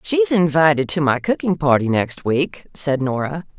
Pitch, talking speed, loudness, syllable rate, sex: 155 Hz, 165 wpm, -18 LUFS, 4.5 syllables/s, female